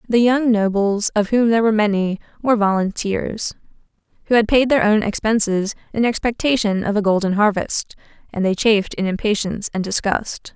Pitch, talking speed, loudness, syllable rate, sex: 210 Hz, 165 wpm, -18 LUFS, 5.4 syllables/s, female